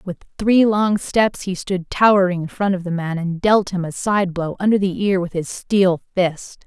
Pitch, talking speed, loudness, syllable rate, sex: 185 Hz, 225 wpm, -19 LUFS, 4.5 syllables/s, female